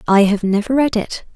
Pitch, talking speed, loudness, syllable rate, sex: 215 Hz, 220 wpm, -16 LUFS, 5.3 syllables/s, female